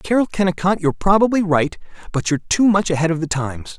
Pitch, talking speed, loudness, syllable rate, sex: 175 Hz, 205 wpm, -18 LUFS, 6.6 syllables/s, male